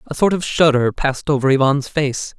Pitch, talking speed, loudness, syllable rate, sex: 140 Hz, 200 wpm, -17 LUFS, 5.3 syllables/s, male